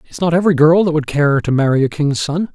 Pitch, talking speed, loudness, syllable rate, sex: 155 Hz, 280 wpm, -15 LUFS, 6.3 syllables/s, male